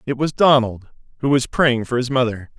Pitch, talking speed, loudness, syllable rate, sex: 125 Hz, 210 wpm, -18 LUFS, 5.2 syllables/s, male